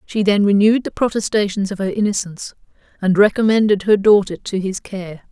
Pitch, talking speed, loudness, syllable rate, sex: 200 Hz, 170 wpm, -17 LUFS, 5.7 syllables/s, female